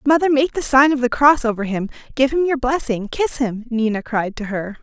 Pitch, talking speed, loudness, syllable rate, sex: 255 Hz, 235 wpm, -18 LUFS, 5.3 syllables/s, female